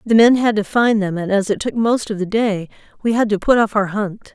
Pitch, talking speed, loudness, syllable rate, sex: 210 Hz, 290 wpm, -17 LUFS, 5.4 syllables/s, female